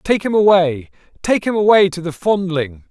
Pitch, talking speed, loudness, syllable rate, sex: 180 Hz, 185 wpm, -15 LUFS, 4.8 syllables/s, male